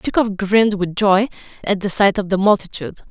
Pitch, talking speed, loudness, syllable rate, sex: 200 Hz, 195 wpm, -17 LUFS, 6.0 syllables/s, female